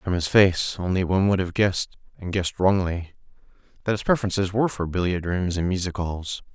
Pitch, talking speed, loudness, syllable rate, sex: 90 Hz, 190 wpm, -23 LUFS, 6.0 syllables/s, male